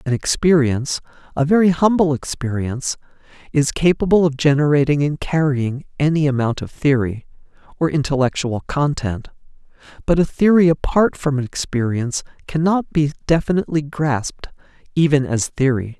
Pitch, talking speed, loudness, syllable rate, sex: 145 Hz, 125 wpm, -18 LUFS, 4.9 syllables/s, male